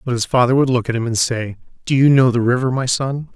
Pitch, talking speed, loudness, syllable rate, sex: 125 Hz, 285 wpm, -17 LUFS, 6.1 syllables/s, male